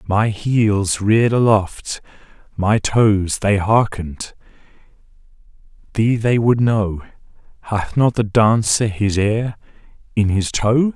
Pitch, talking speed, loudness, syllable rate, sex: 105 Hz, 105 wpm, -17 LUFS, 3.4 syllables/s, male